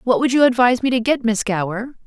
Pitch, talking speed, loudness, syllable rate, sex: 235 Hz, 260 wpm, -17 LUFS, 6.3 syllables/s, female